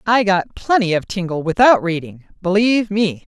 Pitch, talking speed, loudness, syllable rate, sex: 195 Hz, 160 wpm, -17 LUFS, 5.2 syllables/s, female